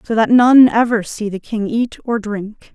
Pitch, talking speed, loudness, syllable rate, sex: 225 Hz, 220 wpm, -15 LUFS, 4.4 syllables/s, female